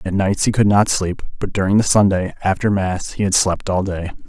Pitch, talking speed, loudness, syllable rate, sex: 95 Hz, 240 wpm, -18 LUFS, 5.3 syllables/s, male